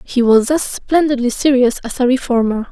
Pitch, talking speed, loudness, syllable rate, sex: 255 Hz, 175 wpm, -15 LUFS, 5.1 syllables/s, female